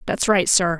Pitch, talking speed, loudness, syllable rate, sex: 185 Hz, 225 wpm, -18 LUFS, 4.8 syllables/s, female